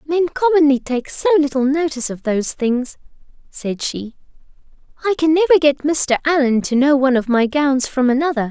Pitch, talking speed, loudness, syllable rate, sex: 280 Hz, 175 wpm, -17 LUFS, 5.3 syllables/s, female